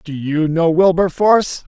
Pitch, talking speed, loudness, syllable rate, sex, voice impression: 170 Hz, 140 wpm, -15 LUFS, 4.5 syllables/s, male, masculine, slightly young, relaxed, bright, soft, muffled, slightly halting, raspy, slightly refreshing, friendly, reassuring, unique, kind, modest